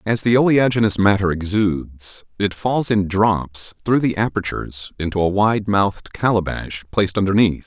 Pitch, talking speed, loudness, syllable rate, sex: 100 Hz, 150 wpm, -19 LUFS, 4.9 syllables/s, male